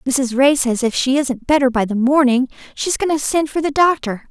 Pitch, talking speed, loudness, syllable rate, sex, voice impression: 270 Hz, 235 wpm, -17 LUFS, 5.1 syllables/s, female, feminine, adult-like, slightly clear, slightly cute, slightly refreshing, friendly, slightly lively